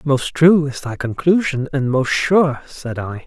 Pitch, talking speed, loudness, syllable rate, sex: 140 Hz, 185 wpm, -17 LUFS, 3.9 syllables/s, male